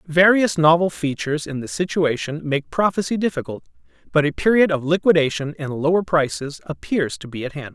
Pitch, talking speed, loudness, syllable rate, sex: 155 Hz, 170 wpm, -20 LUFS, 5.5 syllables/s, male